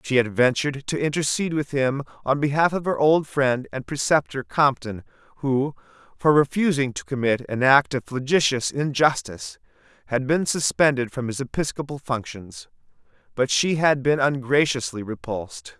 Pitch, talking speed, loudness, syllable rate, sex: 130 Hz, 150 wpm, -22 LUFS, 5.0 syllables/s, male